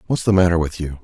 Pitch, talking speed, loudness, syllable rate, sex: 85 Hz, 290 wpm, -18 LUFS, 7.0 syllables/s, male